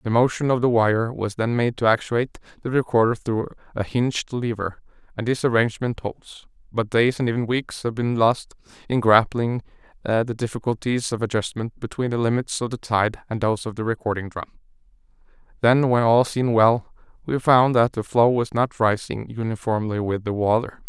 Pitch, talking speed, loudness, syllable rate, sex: 115 Hz, 180 wpm, -22 LUFS, 5.3 syllables/s, male